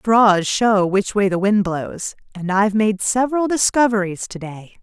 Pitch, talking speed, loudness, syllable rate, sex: 205 Hz, 160 wpm, -18 LUFS, 4.4 syllables/s, female